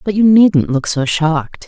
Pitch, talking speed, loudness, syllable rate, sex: 170 Hz, 215 wpm, -13 LUFS, 4.5 syllables/s, female